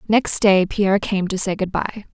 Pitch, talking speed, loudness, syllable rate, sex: 195 Hz, 225 wpm, -18 LUFS, 4.8 syllables/s, female